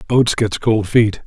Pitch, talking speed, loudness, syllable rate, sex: 110 Hz, 190 wpm, -16 LUFS, 4.8 syllables/s, male